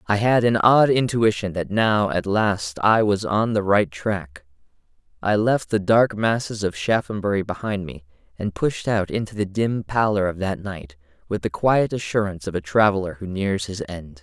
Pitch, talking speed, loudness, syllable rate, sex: 100 Hz, 190 wpm, -21 LUFS, 4.7 syllables/s, male